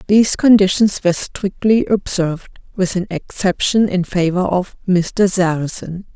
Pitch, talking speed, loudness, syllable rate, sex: 190 Hz, 115 wpm, -16 LUFS, 4.4 syllables/s, female